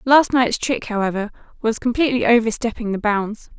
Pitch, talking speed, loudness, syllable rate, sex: 230 Hz, 150 wpm, -19 LUFS, 5.5 syllables/s, female